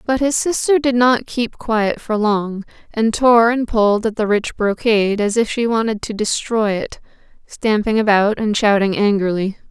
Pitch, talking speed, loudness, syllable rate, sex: 220 Hz, 180 wpm, -17 LUFS, 4.6 syllables/s, female